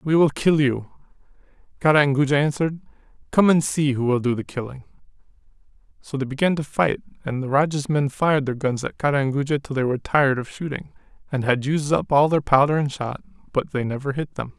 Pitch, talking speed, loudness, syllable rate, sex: 140 Hz, 215 wpm, -22 LUFS, 6.1 syllables/s, male